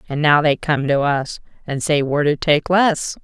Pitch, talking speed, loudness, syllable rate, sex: 150 Hz, 225 wpm, -17 LUFS, 4.7 syllables/s, female